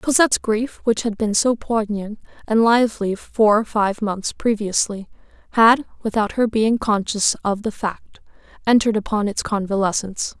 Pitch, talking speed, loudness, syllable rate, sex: 215 Hz, 150 wpm, -19 LUFS, 4.7 syllables/s, female